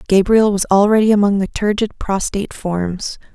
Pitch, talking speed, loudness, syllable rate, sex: 200 Hz, 145 wpm, -16 LUFS, 4.9 syllables/s, female